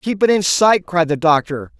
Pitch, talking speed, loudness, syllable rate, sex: 170 Hz, 235 wpm, -15 LUFS, 4.9 syllables/s, male